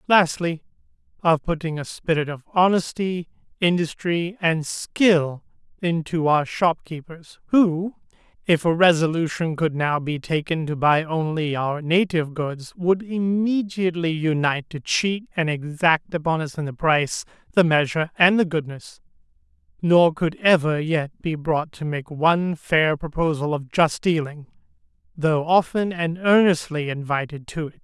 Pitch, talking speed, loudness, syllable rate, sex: 165 Hz, 140 wpm, -22 LUFS, 4.4 syllables/s, male